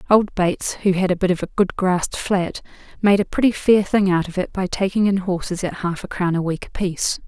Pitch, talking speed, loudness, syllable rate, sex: 185 Hz, 250 wpm, -20 LUFS, 5.6 syllables/s, female